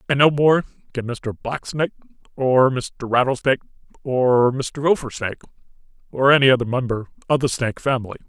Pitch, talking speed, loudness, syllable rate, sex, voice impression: 130 Hz, 145 wpm, -20 LUFS, 5.9 syllables/s, male, masculine, adult-like, thick, powerful, muffled, slightly raspy, cool, intellectual, friendly, slightly unique, wild, kind, modest